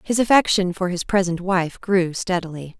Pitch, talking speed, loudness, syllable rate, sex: 185 Hz, 170 wpm, -20 LUFS, 4.8 syllables/s, female